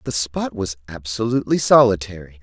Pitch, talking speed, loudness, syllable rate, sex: 95 Hz, 125 wpm, -19 LUFS, 5.4 syllables/s, male